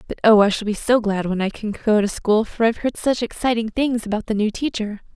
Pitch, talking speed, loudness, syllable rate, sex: 220 Hz, 270 wpm, -20 LUFS, 5.9 syllables/s, female